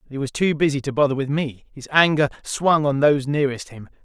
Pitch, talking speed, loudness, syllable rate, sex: 140 Hz, 240 wpm, -20 LUFS, 6.3 syllables/s, male